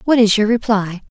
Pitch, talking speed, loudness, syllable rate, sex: 215 Hz, 215 wpm, -15 LUFS, 5.4 syllables/s, female